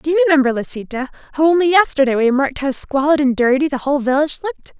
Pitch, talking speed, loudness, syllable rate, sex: 285 Hz, 215 wpm, -16 LUFS, 7.3 syllables/s, female